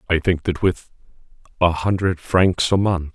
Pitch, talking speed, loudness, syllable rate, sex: 90 Hz, 170 wpm, -19 LUFS, 4.5 syllables/s, male